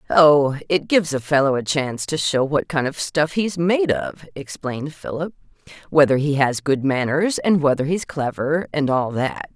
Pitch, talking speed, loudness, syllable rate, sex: 150 Hz, 180 wpm, -20 LUFS, 4.7 syllables/s, female